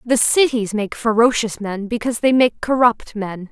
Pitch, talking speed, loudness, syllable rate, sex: 230 Hz, 170 wpm, -18 LUFS, 4.7 syllables/s, female